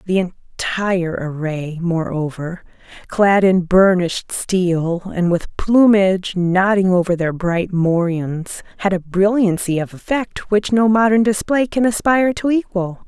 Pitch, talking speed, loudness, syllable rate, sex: 190 Hz, 135 wpm, -17 LUFS, 4.0 syllables/s, female